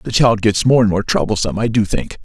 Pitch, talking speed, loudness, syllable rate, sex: 110 Hz, 270 wpm, -15 LUFS, 6.0 syllables/s, male